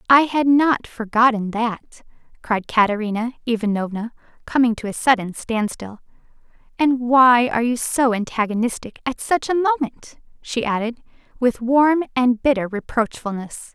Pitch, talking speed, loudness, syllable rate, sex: 240 Hz, 130 wpm, -20 LUFS, 4.9 syllables/s, female